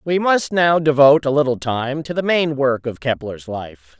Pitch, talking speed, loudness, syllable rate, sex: 145 Hz, 210 wpm, -17 LUFS, 4.6 syllables/s, male